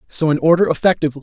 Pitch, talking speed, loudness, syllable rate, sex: 155 Hz, 195 wpm, -15 LUFS, 8.4 syllables/s, male